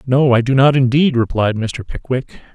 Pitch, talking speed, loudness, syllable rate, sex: 125 Hz, 190 wpm, -15 LUFS, 4.8 syllables/s, male